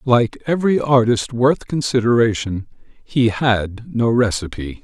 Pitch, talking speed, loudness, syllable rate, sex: 120 Hz, 110 wpm, -18 LUFS, 4.1 syllables/s, male